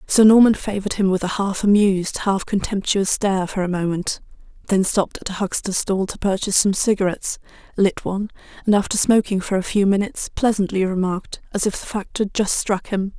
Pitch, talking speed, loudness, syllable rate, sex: 195 Hz, 195 wpm, -20 LUFS, 5.8 syllables/s, female